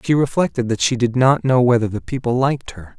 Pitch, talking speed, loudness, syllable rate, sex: 125 Hz, 240 wpm, -18 LUFS, 5.9 syllables/s, male